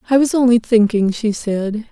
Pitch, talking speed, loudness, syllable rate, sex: 225 Hz, 190 wpm, -16 LUFS, 4.8 syllables/s, female